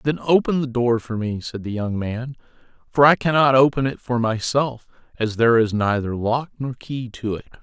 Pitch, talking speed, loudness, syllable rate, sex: 120 Hz, 205 wpm, -20 LUFS, 5.0 syllables/s, male